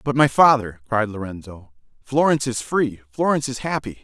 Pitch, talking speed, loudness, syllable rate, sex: 120 Hz, 165 wpm, -20 LUFS, 5.5 syllables/s, male